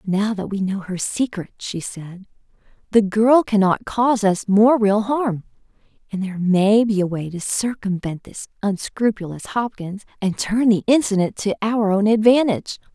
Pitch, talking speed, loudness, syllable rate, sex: 205 Hz, 160 wpm, -19 LUFS, 4.6 syllables/s, female